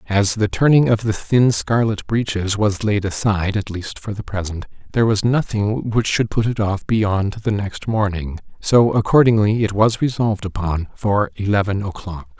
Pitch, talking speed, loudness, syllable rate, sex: 105 Hz, 180 wpm, -19 LUFS, 4.4 syllables/s, male